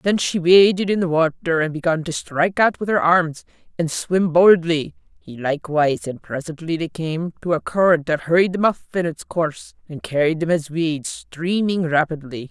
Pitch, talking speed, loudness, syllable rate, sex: 165 Hz, 185 wpm, -19 LUFS, 5.0 syllables/s, female